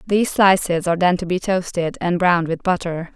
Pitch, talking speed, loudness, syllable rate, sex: 175 Hz, 210 wpm, -19 LUFS, 5.8 syllables/s, female